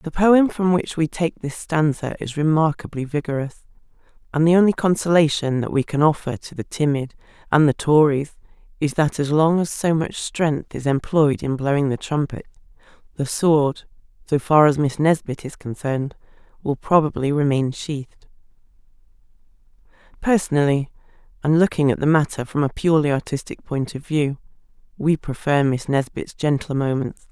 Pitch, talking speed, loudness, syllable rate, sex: 150 Hz, 155 wpm, -20 LUFS, 5.1 syllables/s, female